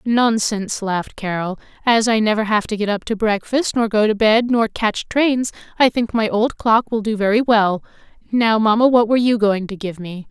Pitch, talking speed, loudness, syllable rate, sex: 220 Hz, 215 wpm, -18 LUFS, 5.0 syllables/s, female